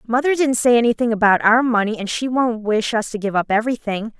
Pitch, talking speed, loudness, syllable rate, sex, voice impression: 230 Hz, 230 wpm, -18 LUFS, 6.0 syllables/s, female, feminine, adult-like, tensed, powerful, clear, raspy, intellectual, friendly, unique, lively, slightly intense, slightly sharp